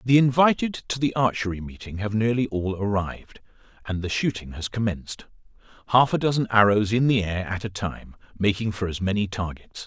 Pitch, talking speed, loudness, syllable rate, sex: 105 Hz, 185 wpm, -24 LUFS, 5.4 syllables/s, male